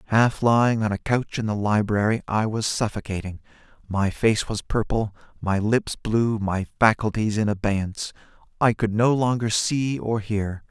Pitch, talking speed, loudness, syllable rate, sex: 110 Hz, 160 wpm, -23 LUFS, 4.5 syllables/s, male